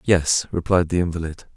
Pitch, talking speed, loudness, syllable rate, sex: 85 Hz, 155 wpm, -21 LUFS, 5.1 syllables/s, male